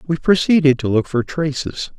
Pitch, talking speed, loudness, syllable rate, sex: 150 Hz, 180 wpm, -17 LUFS, 5.0 syllables/s, male